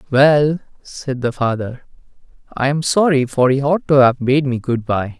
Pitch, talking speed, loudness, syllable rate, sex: 135 Hz, 185 wpm, -16 LUFS, 4.5 syllables/s, male